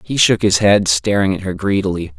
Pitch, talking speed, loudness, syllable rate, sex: 95 Hz, 220 wpm, -15 LUFS, 5.3 syllables/s, male